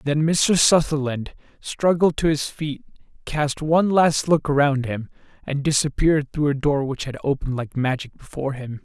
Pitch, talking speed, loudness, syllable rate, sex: 145 Hz, 170 wpm, -21 LUFS, 4.9 syllables/s, male